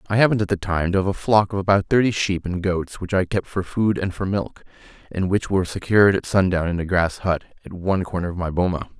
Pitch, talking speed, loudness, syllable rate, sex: 95 Hz, 260 wpm, -21 LUFS, 6.2 syllables/s, male